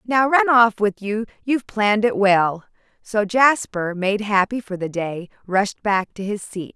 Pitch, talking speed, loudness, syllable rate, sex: 210 Hz, 185 wpm, -20 LUFS, 4.2 syllables/s, female